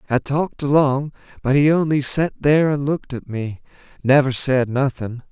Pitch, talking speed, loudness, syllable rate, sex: 140 Hz, 170 wpm, -19 LUFS, 5.1 syllables/s, male